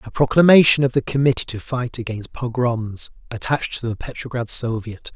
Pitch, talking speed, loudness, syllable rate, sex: 120 Hz, 165 wpm, -19 LUFS, 5.4 syllables/s, male